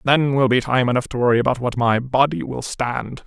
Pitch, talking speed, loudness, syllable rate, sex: 125 Hz, 240 wpm, -19 LUFS, 5.5 syllables/s, male